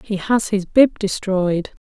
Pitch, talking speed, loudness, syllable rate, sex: 200 Hz, 165 wpm, -18 LUFS, 3.6 syllables/s, female